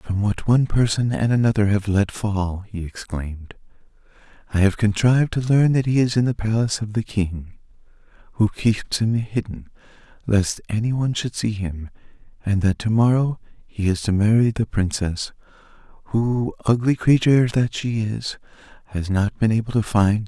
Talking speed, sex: 180 wpm, male